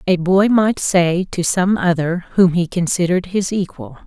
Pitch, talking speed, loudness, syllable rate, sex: 180 Hz, 175 wpm, -17 LUFS, 4.6 syllables/s, female